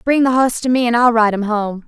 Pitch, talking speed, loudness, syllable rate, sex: 235 Hz, 320 wpm, -15 LUFS, 5.7 syllables/s, female